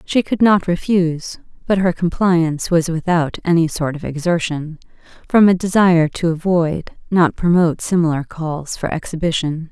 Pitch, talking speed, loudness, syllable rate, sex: 170 Hz, 150 wpm, -17 LUFS, 4.9 syllables/s, female